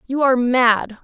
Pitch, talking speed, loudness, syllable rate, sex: 250 Hz, 175 wpm, -16 LUFS, 4.8 syllables/s, female